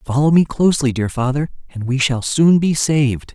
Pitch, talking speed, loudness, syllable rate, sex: 140 Hz, 195 wpm, -16 LUFS, 5.3 syllables/s, male